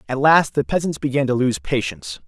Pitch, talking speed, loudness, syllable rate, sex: 125 Hz, 210 wpm, -19 LUFS, 5.8 syllables/s, male